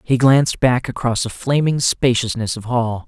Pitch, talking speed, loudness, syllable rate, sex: 120 Hz, 175 wpm, -17 LUFS, 4.7 syllables/s, male